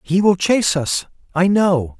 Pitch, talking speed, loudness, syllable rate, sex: 180 Hz, 180 wpm, -17 LUFS, 4.4 syllables/s, male